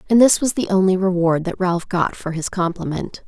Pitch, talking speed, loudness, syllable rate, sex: 185 Hz, 220 wpm, -19 LUFS, 5.2 syllables/s, female